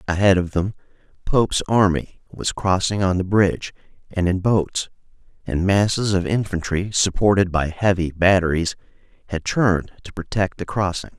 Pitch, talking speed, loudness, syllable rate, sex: 95 Hz, 145 wpm, -20 LUFS, 4.9 syllables/s, male